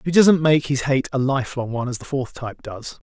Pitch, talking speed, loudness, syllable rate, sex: 135 Hz, 295 wpm, -20 LUFS, 6.4 syllables/s, male